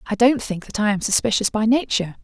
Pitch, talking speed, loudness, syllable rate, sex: 215 Hz, 240 wpm, -20 LUFS, 6.3 syllables/s, female